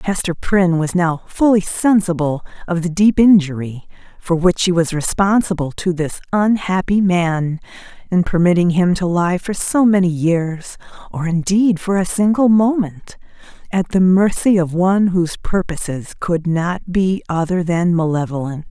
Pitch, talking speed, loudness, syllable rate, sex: 180 Hz, 150 wpm, -16 LUFS, 4.5 syllables/s, female